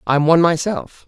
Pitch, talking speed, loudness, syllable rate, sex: 165 Hz, 170 wpm, -16 LUFS, 5.4 syllables/s, female